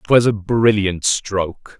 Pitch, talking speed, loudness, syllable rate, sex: 105 Hz, 135 wpm, -17 LUFS, 3.7 syllables/s, male